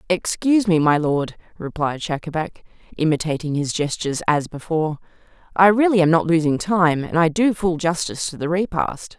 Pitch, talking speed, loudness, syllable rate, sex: 165 Hz, 165 wpm, -20 LUFS, 5.3 syllables/s, female